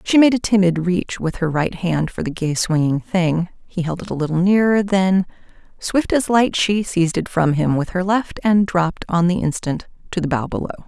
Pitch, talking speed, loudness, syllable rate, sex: 180 Hz, 215 wpm, -19 LUFS, 5.1 syllables/s, female